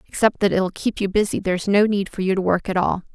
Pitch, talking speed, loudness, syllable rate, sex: 195 Hz, 285 wpm, -20 LUFS, 6.2 syllables/s, female